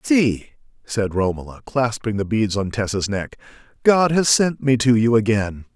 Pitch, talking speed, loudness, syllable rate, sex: 115 Hz, 165 wpm, -19 LUFS, 4.5 syllables/s, male